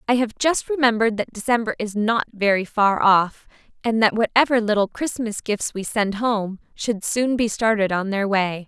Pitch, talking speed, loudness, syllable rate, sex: 215 Hz, 185 wpm, -21 LUFS, 4.8 syllables/s, female